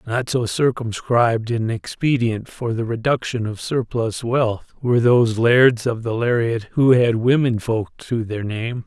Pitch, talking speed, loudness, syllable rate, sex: 115 Hz, 155 wpm, -19 LUFS, 4.2 syllables/s, male